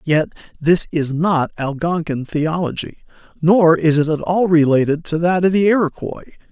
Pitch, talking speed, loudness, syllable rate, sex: 165 Hz, 155 wpm, -17 LUFS, 4.8 syllables/s, male